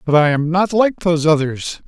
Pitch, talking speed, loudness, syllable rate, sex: 165 Hz, 225 wpm, -16 LUFS, 5.2 syllables/s, male